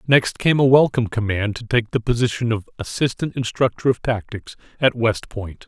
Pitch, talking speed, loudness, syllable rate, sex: 120 Hz, 180 wpm, -20 LUFS, 5.2 syllables/s, male